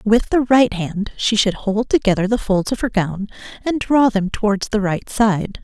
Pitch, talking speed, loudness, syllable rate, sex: 210 Hz, 215 wpm, -18 LUFS, 4.5 syllables/s, female